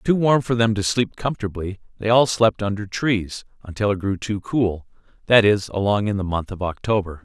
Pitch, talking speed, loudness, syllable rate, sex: 105 Hz, 230 wpm, -21 LUFS, 5.7 syllables/s, male